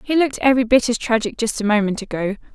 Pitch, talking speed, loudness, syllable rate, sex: 235 Hz, 235 wpm, -19 LUFS, 7.0 syllables/s, female